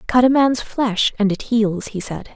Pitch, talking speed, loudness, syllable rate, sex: 225 Hz, 230 wpm, -18 LUFS, 4.3 syllables/s, female